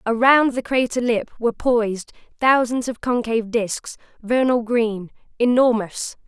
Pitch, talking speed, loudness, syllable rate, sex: 235 Hz, 125 wpm, -20 LUFS, 4.4 syllables/s, female